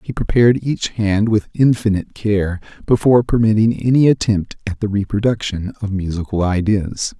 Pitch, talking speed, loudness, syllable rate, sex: 105 Hz, 140 wpm, -17 LUFS, 5.2 syllables/s, male